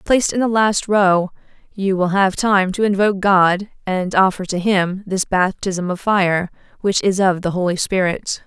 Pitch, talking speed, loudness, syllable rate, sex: 190 Hz, 185 wpm, -17 LUFS, 4.4 syllables/s, female